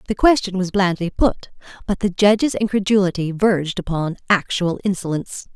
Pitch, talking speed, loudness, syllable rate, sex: 190 Hz, 140 wpm, -19 LUFS, 5.6 syllables/s, female